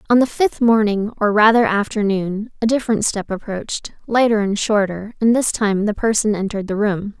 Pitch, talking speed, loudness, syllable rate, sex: 210 Hz, 175 wpm, -18 LUFS, 5.3 syllables/s, female